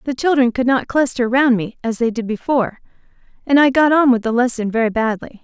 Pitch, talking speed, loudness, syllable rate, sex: 245 Hz, 220 wpm, -17 LUFS, 6.1 syllables/s, female